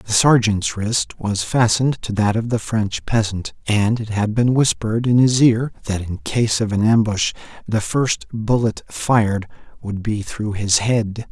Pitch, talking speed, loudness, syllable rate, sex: 110 Hz, 180 wpm, -19 LUFS, 4.2 syllables/s, male